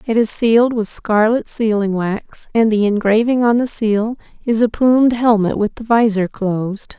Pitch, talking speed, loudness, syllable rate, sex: 220 Hz, 180 wpm, -16 LUFS, 4.6 syllables/s, female